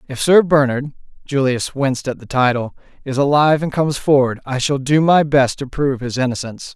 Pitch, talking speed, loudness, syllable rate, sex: 135 Hz, 180 wpm, -17 LUFS, 5.9 syllables/s, male